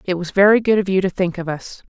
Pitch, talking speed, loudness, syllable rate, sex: 190 Hz, 315 wpm, -17 LUFS, 6.4 syllables/s, female